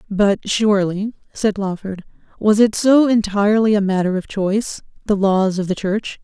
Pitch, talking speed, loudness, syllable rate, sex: 205 Hz, 155 wpm, -17 LUFS, 4.8 syllables/s, female